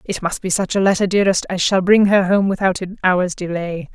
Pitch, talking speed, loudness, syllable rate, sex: 190 Hz, 245 wpm, -17 LUFS, 5.6 syllables/s, female